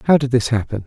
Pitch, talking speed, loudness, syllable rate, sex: 120 Hz, 280 wpm, -18 LUFS, 7.0 syllables/s, male